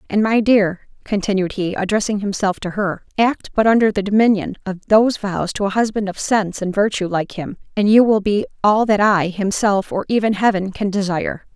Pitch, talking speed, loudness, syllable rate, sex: 205 Hz, 200 wpm, -18 LUFS, 5.3 syllables/s, female